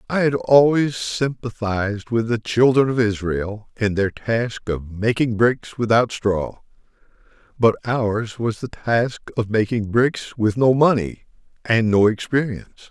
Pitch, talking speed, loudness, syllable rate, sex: 115 Hz, 145 wpm, -20 LUFS, 4.0 syllables/s, male